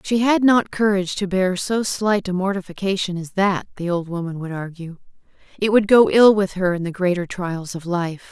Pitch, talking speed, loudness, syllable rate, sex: 190 Hz, 215 wpm, -20 LUFS, 5.2 syllables/s, female